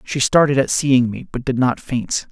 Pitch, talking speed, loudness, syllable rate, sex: 130 Hz, 235 wpm, -18 LUFS, 4.6 syllables/s, male